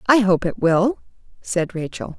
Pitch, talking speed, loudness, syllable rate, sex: 195 Hz, 165 wpm, -20 LUFS, 4.2 syllables/s, female